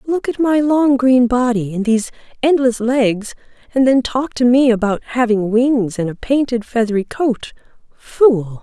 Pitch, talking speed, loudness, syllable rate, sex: 245 Hz, 165 wpm, -16 LUFS, 4.3 syllables/s, female